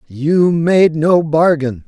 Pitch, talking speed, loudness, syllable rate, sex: 160 Hz, 130 wpm, -13 LUFS, 2.9 syllables/s, male